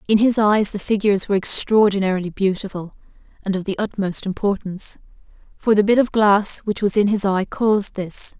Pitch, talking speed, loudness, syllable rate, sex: 200 Hz, 180 wpm, -19 LUFS, 5.6 syllables/s, female